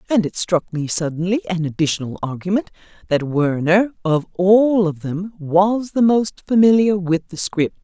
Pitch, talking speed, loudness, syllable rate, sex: 180 Hz, 160 wpm, -18 LUFS, 4.5 syllables/s, female